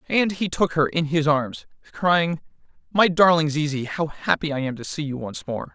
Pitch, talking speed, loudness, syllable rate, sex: 155 Hz, 210 wpm, -22 LUFS, 4.8 syllables/s, male